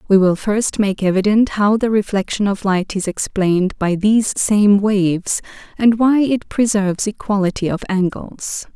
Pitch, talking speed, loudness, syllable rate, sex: 205 Hz, 160 wpm, -17 LUFS, 4.6 syllables/s, female